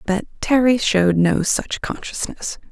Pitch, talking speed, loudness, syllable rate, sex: 210 Hz, 130 wpm, -19 LUFS, 4.0 syllables/s, female